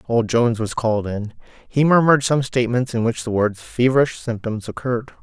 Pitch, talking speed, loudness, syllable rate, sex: 120 Hz, 185 wpm, -20 LUFS, 5.7 syllables/s, male